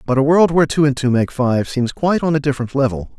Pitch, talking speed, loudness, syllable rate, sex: 140 Hz, 285 wpm, -16 LUFS, 6.6 syllables/s, male